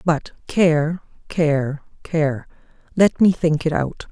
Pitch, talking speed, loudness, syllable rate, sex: 155 Hz, 130 wpm, -20 LUFS, 3.1 syllables/s, female